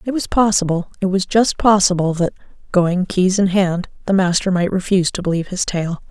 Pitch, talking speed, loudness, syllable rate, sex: 185 Hz, 195 wpm, -17 LUFS, 5.5 syllables/s, female